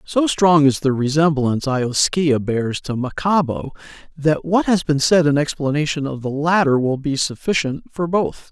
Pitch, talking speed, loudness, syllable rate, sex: 150 Hz, 170 wpm, -18 LUFS, 4.8 syllables/s, male